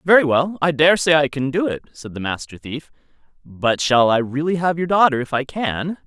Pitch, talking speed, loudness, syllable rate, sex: 150 Hz, 220 wpm, -18 LUFS, 5.3 syllables/s, male